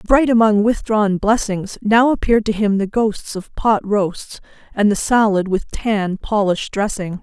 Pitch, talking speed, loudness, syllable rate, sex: 210 Hz, 165 wpm, -17 LUFS, 4.1 syllables/s, female